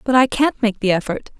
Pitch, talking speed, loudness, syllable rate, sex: 230 Hz, 260 wpm, -18 LUFS, 5.6 syllables/s, female